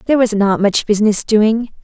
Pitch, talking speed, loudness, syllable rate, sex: 215 Hz, 195 wpm, -14 LUFS, 5.2 syllables/s, female